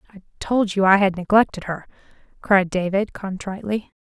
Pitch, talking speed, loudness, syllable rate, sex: 195 Hz, 150 wpm, -20 LUFS, 5.6 syllables/s, female